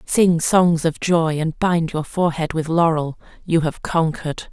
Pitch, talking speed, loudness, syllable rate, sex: 165 Hz, 160 wpm, -19 LUFS, 4.4 syllables/s, female